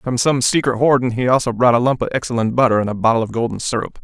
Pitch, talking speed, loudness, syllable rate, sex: 120 Hz, 270 wpm, -17 LUFS, 6.8 syllables/s, male